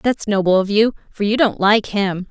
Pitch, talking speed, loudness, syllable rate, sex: 205 Hz, 210 wpm, -17 LUFS, 4.7 syllables/s, female